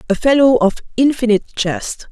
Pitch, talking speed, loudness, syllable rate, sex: 230 Hz, 140 wpm, -15 LUFS, 5.7 syllables/s, female